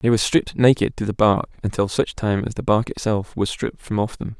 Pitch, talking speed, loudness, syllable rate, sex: 105 Hz, 260 wpm, -21 LUFS, 6.0 syllables/s, male